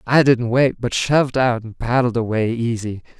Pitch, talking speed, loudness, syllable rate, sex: 120 Hz, 190 wpm, -18 LUFS, 4.8 syllables/s, male